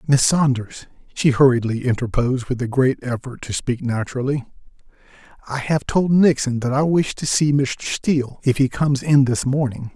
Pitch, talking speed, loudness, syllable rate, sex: 130 Hz, 175 wpm, -19 LUFS, 5.1 syllables/s, male